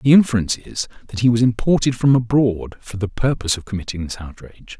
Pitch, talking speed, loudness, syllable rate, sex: 110 Hz, 200 wpm, -19 LUFS, 6.4 syllables/s, male